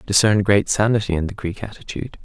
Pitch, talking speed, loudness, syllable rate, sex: 100 Hz, 215 wpm, -19 LUFS, 6.5 syllables/s, male